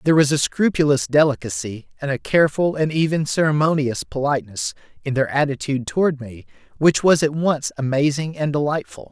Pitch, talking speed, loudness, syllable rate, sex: 145 Hz, 160 wpm, -20 LUFS, 5.7 syllables/s, male